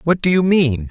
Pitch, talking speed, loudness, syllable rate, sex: 155 Hz, 265 wpm, -15 LUFS, 4.9 syllables/s, male